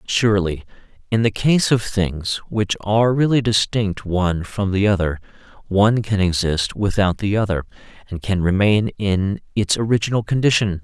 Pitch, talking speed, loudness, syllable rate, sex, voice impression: 100 Hz, 150 wpm, -19 LUFS, 4.9 syllables/s, male, masculine, middle-aged, tensed, slightly powerful, bright, slightly hard, clear, slightly nasal, cool, intellectual, calm, slightly friendly, wild, slightly kind